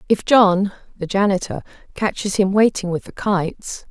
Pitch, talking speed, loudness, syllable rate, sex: 195 Hz, 125 wpm, -19 LUFS, 4.8 syllables/s, female